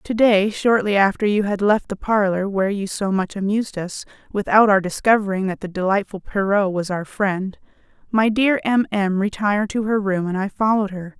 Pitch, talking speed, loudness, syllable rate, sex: 200 Hz, 200 wpm, -20 LUFS, 5.3 syllables/s, female